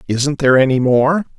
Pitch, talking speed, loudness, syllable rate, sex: 140 Hz, 175 wpm, -14 LUFS, 5.4 syllables/s, male